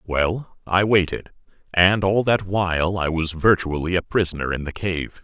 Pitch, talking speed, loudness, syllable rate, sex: 90 Hz, 170 wpm, -21 LUFS, 4.5 syllables/s, male